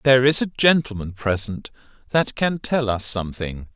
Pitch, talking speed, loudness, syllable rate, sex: 120 Hz, 160 wpm, -21 LUFS, 5.0 syllables/s, male